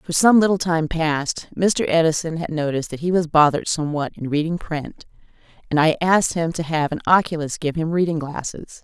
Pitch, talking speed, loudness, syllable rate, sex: 160 Hz, 195 wpm, -20 LUFS, 5.6 syllables/s, female